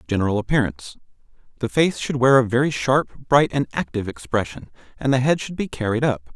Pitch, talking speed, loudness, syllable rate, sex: 125 Hz, 180 wpm, -21 LUFS, 5.9 syllables/s, male